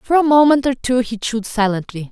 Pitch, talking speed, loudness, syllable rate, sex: 240 Hz, 225 wpm, -16 LUFS, 5.8 syllables/s, female